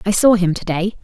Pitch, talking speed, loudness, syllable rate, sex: 190 Hz, 290 wpm, -16 LUFS, 5.8 syllables/s, female